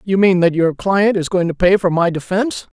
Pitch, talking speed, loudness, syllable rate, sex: 185 Hz, 260 wpm, -16 LUFS, 5.8 syllables/s, male